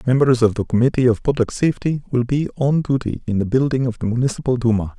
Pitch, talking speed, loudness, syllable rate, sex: 125 Hz, 215 wpm, -19 LUFS, 6.5 syllables/s, male